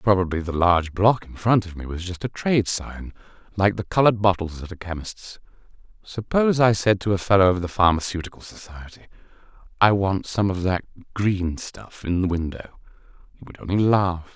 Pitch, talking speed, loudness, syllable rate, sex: 95 Hz, 185 wpm, -22 LUFS, 5.3 syllables/s, male